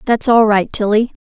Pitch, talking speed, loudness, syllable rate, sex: 220 Hz, 195 wpm, -13 LUFS, 4.9 syllables/s, female